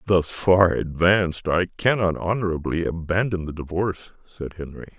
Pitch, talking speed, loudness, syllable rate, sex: 90 Hz, 130 wpm, -22 LUFS, 4.9 syllables/s, male